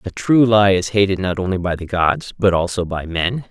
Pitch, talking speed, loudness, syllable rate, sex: 95 Hz, 240 wpm, -17 LUFS, 5.0 syllables/s, male